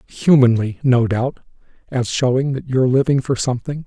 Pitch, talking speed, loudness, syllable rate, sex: 130 Hz, 155 wpm, -17 LUFS, 5.2 syllables/s, male